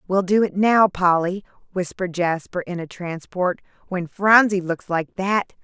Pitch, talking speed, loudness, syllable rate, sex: 185 Hz, 160 wpm, -21 LUFS, 4.4 syllables/s, female